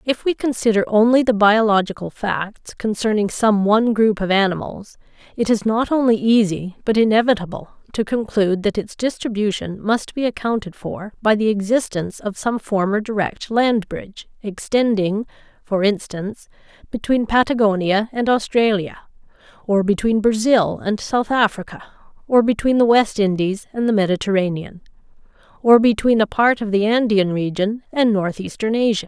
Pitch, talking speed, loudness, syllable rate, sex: 215 Hz, 145 wpm, -18 LUFS, 5.0 syllables/s, female